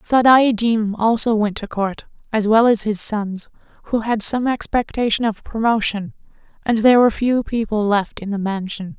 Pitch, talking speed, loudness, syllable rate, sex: 220 Hz, 165 wpm, -18 LUFS, 4.8 syllables/s, female